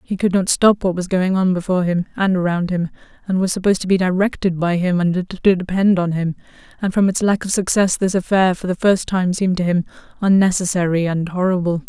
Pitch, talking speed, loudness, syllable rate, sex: 185 Hz, 220 wpm, -18 LUFS, 5.8 syllables/s, female